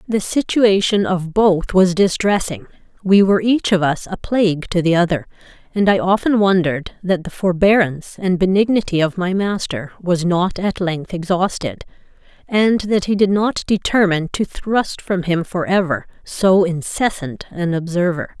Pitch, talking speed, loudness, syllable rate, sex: 185 Hz, 160 wpm, -17 LUFS, 4.7 syllables/s, female